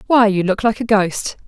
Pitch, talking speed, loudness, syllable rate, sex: 210 Hz, 245 wpm, -16 LUFS, 4.9 syllables/s, female